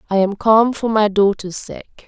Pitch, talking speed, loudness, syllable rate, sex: 210 Hz, 205 wpm, -16 LUFS, 4.3 syllables/s, female